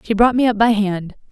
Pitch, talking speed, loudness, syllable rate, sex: 215 Hz, 275 wpm, -16 LUFS, 5.5 syllables/s, female